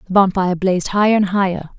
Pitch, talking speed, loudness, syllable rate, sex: 190 Hz, 200 wpm, -16 LUFS, 7.1 syllables/s, female